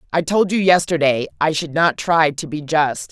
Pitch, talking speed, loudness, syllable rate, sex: 160 Hz, 210 wpm, -17 LUFS, 4.7 syllables/s, female